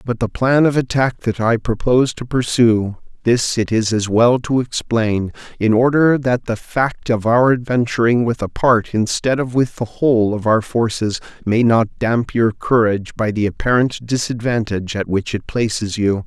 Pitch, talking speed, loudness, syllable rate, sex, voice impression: 115 Hz, 185 wpm, -17 LUFS, 4.6 syllables/s, male, masculine, adult-like, tensed, bright, slightly soft, cool, intellectual, friendly, reassuring, wild, kind